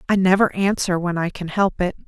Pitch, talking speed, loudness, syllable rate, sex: 185 Hz, 230 wpm, -20 LUFS, 5.5 syllables/s, female